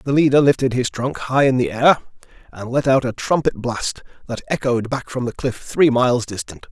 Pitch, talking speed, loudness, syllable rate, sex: 125 Hz, 215 wpm, -19 LUFS, 5.2 syllables/s, male